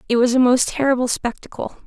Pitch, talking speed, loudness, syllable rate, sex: 250 Hz, 195 wpm, -18 LUFS, 6.2 syllables/s, female